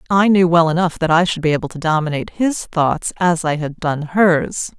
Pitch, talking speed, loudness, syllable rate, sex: 165 Hz, 225 wpm, -17 LUFS, 5.1 syllables/s, female